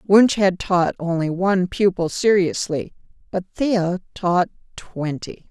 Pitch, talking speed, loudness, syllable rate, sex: 180 Hz, 120 wpm, -20 LUFS, 3.8 syllables/s, female